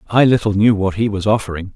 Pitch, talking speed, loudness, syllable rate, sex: 105 Hz, 240 wpm, -16 LUFS, 6.4 syllables/s, male